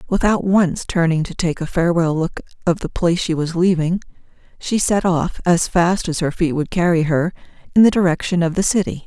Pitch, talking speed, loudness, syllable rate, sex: 175 Hz, 205 wpm, -18 LUFS, 5.5 syllables/s, female